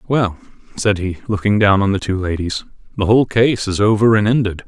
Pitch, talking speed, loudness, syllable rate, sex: 105 Hz, 205 wpm, -16 LUFS, 5.7 syllables/s, male